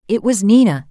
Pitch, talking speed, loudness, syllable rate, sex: 200 Hz, 200 wpm, -13 LUFS, 5.5 syllables/s, female